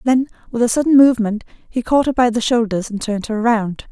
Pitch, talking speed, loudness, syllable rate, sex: 230 Hz, 230 wpm, -17 LUFS, 5.8 syllables/s, female